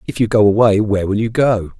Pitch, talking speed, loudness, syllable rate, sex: 105 Hz, 265 wpm, -15 LUFS, 6.3 syllables/s, male